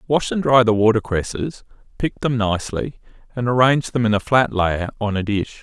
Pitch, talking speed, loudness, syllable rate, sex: 115 Hz, 205 wpm, -19 LUFS, 5.3 syllables/s, male